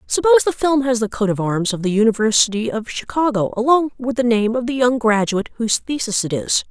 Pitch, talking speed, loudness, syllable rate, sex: 235 Hz, 225 wpm, -18 LUFS, 6.0 syllables/s, female